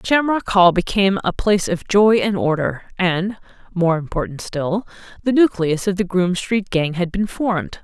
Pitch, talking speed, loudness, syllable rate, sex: 190 Hz, 160 wpm, -19 LUFS, 4.9 syllables/s, female